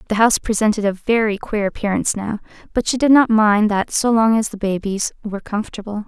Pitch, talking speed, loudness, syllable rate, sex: 215 Hz, 205 wpm, -18 LUFS, 6.1 syllables/s, female